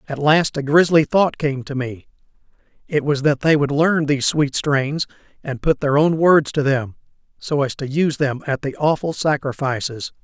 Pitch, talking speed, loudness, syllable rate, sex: 145 Hz, 195 wpm, -19 LUFS, 4.8 syllables/s, male